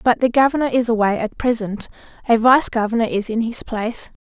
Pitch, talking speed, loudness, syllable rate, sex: 230 Hz, 200 wpm, -18 LUFS, 5.7 syllables/s, female